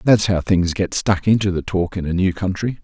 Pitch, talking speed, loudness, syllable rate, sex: 95 Hz, 255 wpm, -19 LUFS, 5.2 syllables/s, male